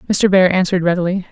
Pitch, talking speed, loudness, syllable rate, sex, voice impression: 185 Hz, 180 wpm, -14 LUFS, 7.3 syllables/s, female, very feminine, slightly young, thin, tensed, slightly weak, bright, hard, slightly clear, fluent, slightly raspy, slightly cute, cool, intellectual, very refreshing, very sincere, calm, friendly, reassuring, unique, very elegant, slightly wild, sweet, slightly lively, kind, slightly intense, modest, slightly light